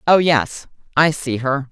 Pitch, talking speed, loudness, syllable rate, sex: 140 Hz, 175 wpm, -17 LUFS, 4.0 syllables/s, female